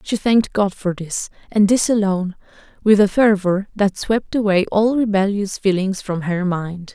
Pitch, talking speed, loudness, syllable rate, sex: 200 Hz, 175 wpm, -18 LUFS, 4.6 syllables/s, female